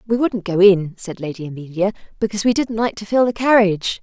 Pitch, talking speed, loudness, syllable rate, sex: 200 Hz, 225 wpm, -18 LUFS, 6.1 syllables/s, female